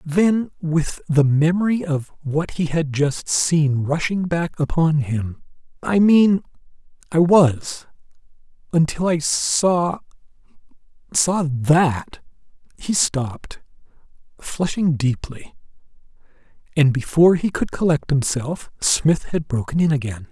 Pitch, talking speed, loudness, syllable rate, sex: 155 Hz, 110 wpm, -19 LUFS, 3.7 syllables/s, male